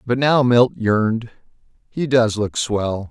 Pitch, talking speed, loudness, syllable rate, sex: 120 Hz, 155 wpm, -18 LUFS, 3.6 syllables/s, male